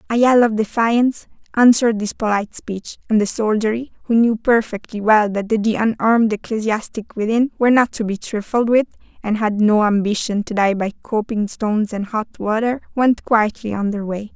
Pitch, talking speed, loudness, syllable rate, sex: 220 Hz, 180 wpm, -18 LUFS, 5.2 syllables/s, female